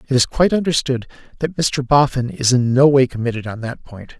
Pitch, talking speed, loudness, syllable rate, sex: 130 Hz, 215 wpm, -17 LUFS, 5.7 syllables/s, male